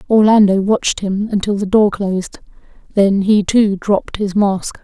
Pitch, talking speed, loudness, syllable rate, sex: 200 Hz, 160 wpm, -15 LUFS, 4.4 syllables/s, female